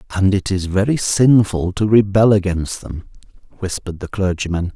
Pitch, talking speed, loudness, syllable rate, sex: 100 Hz, 150 wpm, -17 LUFS, 5.1 syllables/s, male